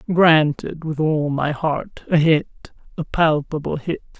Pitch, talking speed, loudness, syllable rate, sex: 155 Hz, 130 wpm, -19 LUFS, 3.7 syllables/s, female